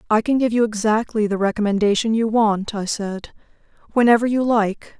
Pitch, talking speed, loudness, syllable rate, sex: 220 Hz, 170 wpm, -19 LUFS, 5.3 syllables/s, female